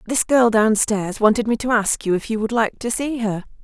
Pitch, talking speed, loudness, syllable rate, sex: 220 Hz, 265 wpm, -19 LUFS, 5.2 syllables/s, female